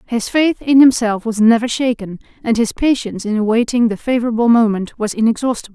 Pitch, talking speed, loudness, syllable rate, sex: 230 Hz, 180 wpm, -15 LUFS, 5.9 syllables/s, female